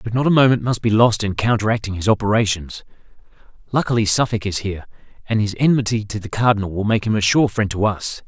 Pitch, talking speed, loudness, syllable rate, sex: 110 Hz, 210 wpm, -18 LUFS, 6.4 syllables/s, male